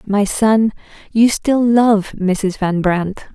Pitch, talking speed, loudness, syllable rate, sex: 210 Hz, 145 wpm, -15 LUFS, 3.0 syllables/s, female